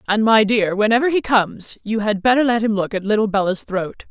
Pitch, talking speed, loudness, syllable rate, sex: 215 Hz, 235 wpm, -18 LUFS, 5.7 syllables/s, female